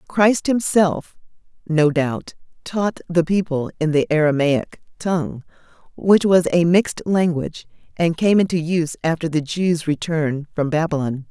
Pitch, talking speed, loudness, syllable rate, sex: 165 Hz, 140 wpm, -19 LUFS, 4.4 syllables/s, female